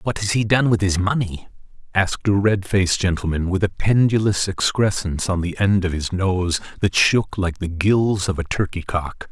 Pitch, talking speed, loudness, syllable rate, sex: 95 Hz, 200 wpm, -20 LUFS, 4.9 syllables/s, male